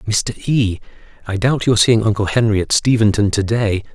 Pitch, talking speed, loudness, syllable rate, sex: 110 Hz, 180 wpm, -16 LUFS, 4.8 syllables/s, male